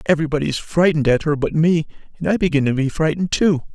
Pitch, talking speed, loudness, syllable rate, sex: 155 Hz, 225 wpm, -18 LUFS, 7.1 syllables/s, male